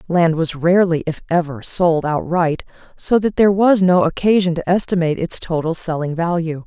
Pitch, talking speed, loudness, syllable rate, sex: 170 Hz, 170 wpm, -17 LUFS, 5.3 syllables/s, female